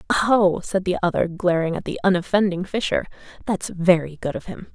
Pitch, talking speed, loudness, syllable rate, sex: 185 Hz, 175 wpm, -21 LUFS, 5.3 syllables/s, female